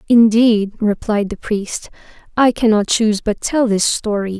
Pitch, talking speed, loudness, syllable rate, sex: 215 Hz, 150 wpm, -16 LUFS, 4.3 syllables/s, female